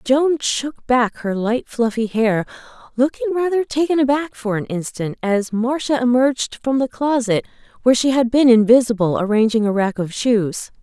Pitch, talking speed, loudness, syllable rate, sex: 240 Hz, 165 wpm, -18 LUFS, 4.8 syllables/s, female